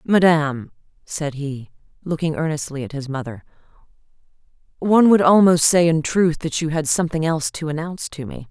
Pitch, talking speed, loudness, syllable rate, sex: 155 Hz, 160 wpm, -19 LUFS, 5.6 syllables/s, female